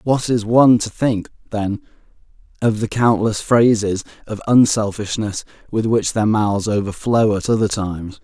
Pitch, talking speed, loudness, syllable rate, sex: 110 Hz, 145 wpm, -18 LUFS, 4.6 syllables/s, male